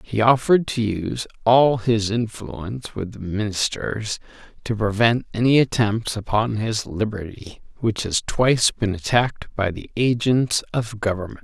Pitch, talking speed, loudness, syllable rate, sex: 110 Hz, 140 wpm, -21 LUFS, 4.5 syllables/s, male